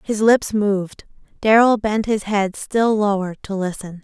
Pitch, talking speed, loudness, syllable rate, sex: 205 Hz, 165 wpm, -18 LUFS, 4.3 syllables/s, female